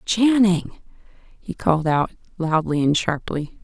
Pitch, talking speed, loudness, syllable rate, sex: 175 Hz, 115 wpm, -20 LUFS, 3.9 syllables/s, female